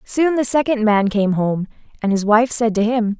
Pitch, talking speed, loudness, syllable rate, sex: 225 Hz, 225 wpm, -17 LUFS, 4.7 syllables/s, female